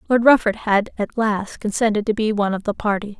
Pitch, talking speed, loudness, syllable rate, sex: 210 Hz, 225 wpm, -19 LUFS, 5.9 syllables/s, female